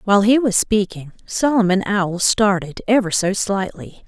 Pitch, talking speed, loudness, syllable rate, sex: 200 Hz, 145 wpm, -18 LUFS, 4.6 syllables/s, female